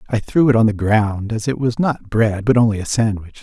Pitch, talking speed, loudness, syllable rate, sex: 110 Hz, 265 wpm, -17 LUFS, 5.2 syllables/s, male